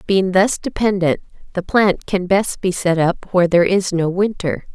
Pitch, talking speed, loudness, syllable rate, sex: 185 Hz, 190 wpm, -17 LUFS, 4.7 syllables/s, female